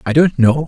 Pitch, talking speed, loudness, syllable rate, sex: 140 Hz, 265 wpm, -13 LUFS, 5.5 syllables/s, male